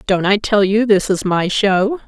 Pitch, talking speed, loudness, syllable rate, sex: 205 Hz, 230 wpm, -15 LUFS, 4.2 syllables/s, female